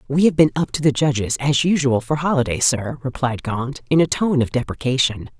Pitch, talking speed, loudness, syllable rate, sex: 135 Hz, 210 wpm, -19 LUFS, 5.4 syllables/s, female